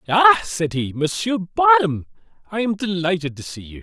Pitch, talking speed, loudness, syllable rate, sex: 150 Hz, 175 wpm, -19 LUFS, 4.7 syllables/s, male